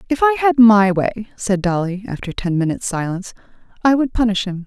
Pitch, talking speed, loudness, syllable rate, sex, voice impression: 215 Hz, 195 wpm, -17 LUFS, 5.8 syllables/s, female, feminine, very adult-like, calm, slightly reassuring, elegant, slightly sweet